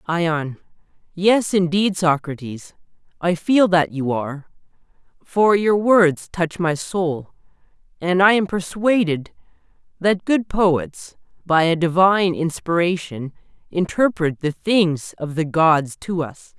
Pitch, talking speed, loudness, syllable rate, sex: 175 Hz, 125 wpm, -19 LUFS, 3.7 syllables/s, male